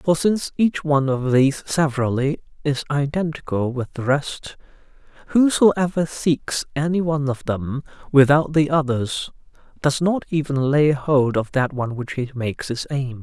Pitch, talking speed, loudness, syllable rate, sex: 145 Hz, 155 wpm, -21 LUFS, 4.7 syllables/s, male